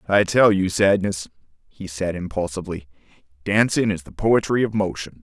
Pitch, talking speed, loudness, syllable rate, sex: 95 Hz, 150 wpm, -21 LUFS, 5.1 syllables/s, male